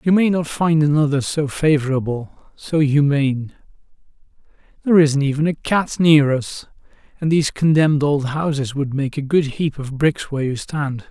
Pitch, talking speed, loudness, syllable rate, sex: 145 Hz, 165 wpm, -18 LUFS, 4.9 syllables/s, male